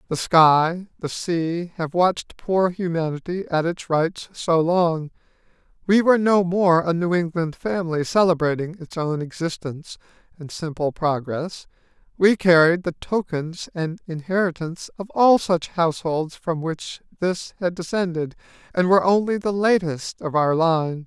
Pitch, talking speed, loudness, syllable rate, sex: 170 Hz, 145 wpm, -21 LUFS, 4.5 syllables/s, male